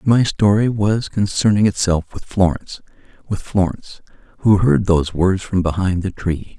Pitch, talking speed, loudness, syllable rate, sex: 95 Hz, 155 wpm, -18 LUFS, 4.9 syllables/s, male